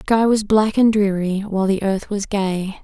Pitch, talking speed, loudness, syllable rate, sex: 200 Hz, 235 wpm, -18 LUFS, 4.8 syllables/s, female